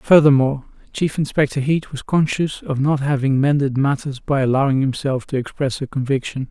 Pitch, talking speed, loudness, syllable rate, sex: 140 Hz, 165 wpm, -19 LUFS, 5.5 syllables/s, male